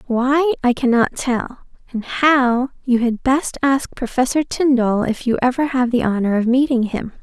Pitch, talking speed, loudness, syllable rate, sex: 250 Hz, 175 wpm, -18 LUFS, 4.5 syllables/s, female